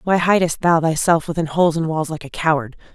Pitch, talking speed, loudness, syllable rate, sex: 160 Hz, 225 wpm, -18 LUFS, 5.9 syllables/s, female